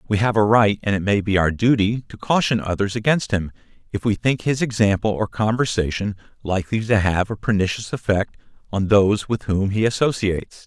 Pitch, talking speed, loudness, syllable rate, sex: 105 Hz, 190 wpm, -20 LUFS, 5.5 syllables/s, male